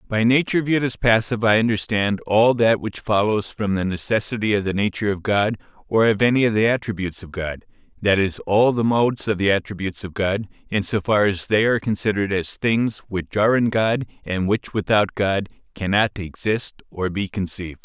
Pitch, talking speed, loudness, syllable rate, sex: 105 Hz, 200 wpm, -21 LUFS, 5.6 syllables/s, male